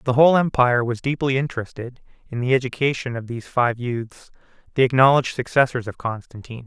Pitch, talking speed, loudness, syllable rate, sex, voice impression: 125 Hz, 160 wpm, -20 LUFS, 6.3 syllables/s, male, masculine, adult-like, slightly muffled, slightly refreshing, slightly sincere, friendly